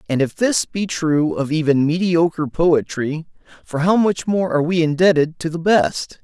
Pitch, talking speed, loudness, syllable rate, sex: 165 Hz, 185 wpm, -18 LUFS, 4.6 syllables/s, male